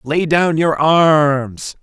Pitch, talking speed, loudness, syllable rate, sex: 155 Hz, 130 wpm, -14 LUFS, 2.4 syllables/s, male